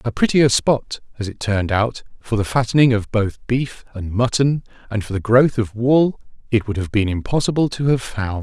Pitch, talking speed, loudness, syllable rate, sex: 115 Hz, 205 wpm, -19 LUFS, 5.0 syllables/s, male